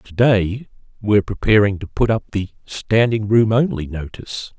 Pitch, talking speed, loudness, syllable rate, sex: 105 Hz, 155 wpm, -18 LUFS, 5.0 syllables/s, male